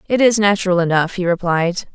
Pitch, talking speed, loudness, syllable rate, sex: 185 Hz, 185 wpm, -16 LUFS, 5.8 syllables/s, female